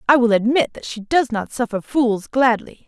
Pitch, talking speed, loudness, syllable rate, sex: 240 Hz, 210 wpm, -19 LUFS, 4.8 syllables/s, female